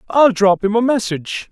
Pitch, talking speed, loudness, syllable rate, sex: 215 Hz, 200 wpm, -15 LUFS, 5.3 syllables/s, male